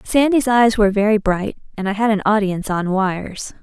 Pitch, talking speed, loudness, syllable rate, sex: 210 Hz, 200 wpm, -17 LUFS, 5.6 syllables/s, female